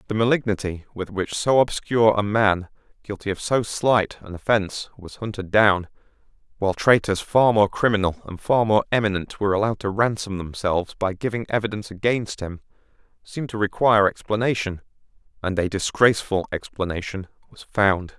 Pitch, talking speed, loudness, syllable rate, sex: 105 Hz, 150 wpm, -22 LUFS, 5.6 syllables/s, male